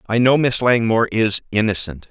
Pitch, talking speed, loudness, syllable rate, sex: 110 Hz, 170 wpm, -17 LUFS, 5.2 syllables/s, male